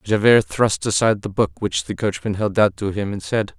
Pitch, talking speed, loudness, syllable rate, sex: 105 Hz, 235 wpm, -20 LUFS, 5.2 syllables/s, male